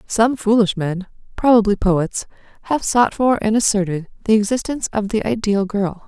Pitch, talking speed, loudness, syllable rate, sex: 210 Hz, 140 wpm, -18 LUFS, 5.0 syllables/s, female